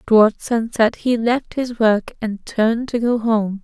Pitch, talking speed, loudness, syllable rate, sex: 225 Hz, 180 wpm, -18 LUFS, 4.1 syllables/s, female